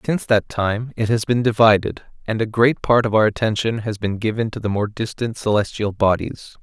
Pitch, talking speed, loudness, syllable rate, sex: 110 Hz, 210 wpm, -19 LUFS, 5.4 syllables/s, male